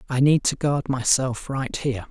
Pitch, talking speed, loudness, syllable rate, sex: 135 Hz, 200 wpm, -22 LUFS, 4.7 syllables/s, male